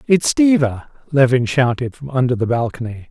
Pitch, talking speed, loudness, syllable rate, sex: 130 Hz, 155 wpm, -17 LUFS, 5.4 syllables/s, male